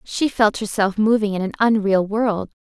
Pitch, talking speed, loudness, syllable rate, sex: 210 Hz, 185 wpm, -19 LUFS, 4.6 syllables/s, female